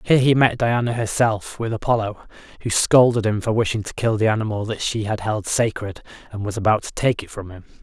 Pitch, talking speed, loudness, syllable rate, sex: 110 Hz, 220 wpm, -20 LUFS, 5.8 syllables/s, male